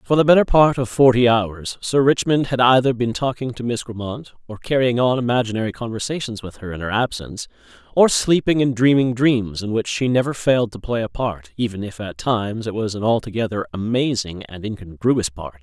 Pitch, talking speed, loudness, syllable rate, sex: 115 Hz, 200 wpm, -19 LUFS, 5.5 syllables/s, male